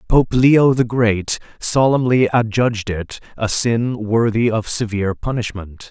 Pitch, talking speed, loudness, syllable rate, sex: 115 Hz, 130 wpm, -17 LUFS, 4.1 syllables/s, male